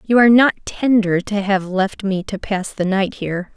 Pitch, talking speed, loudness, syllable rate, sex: 200 Hz, 220 wpm, -17 LUFS, 4.8 syllables/s, female